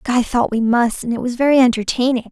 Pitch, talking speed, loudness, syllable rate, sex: 240 Hz, 235 wpm, -17 LUFS, 5.9 syllables/s, female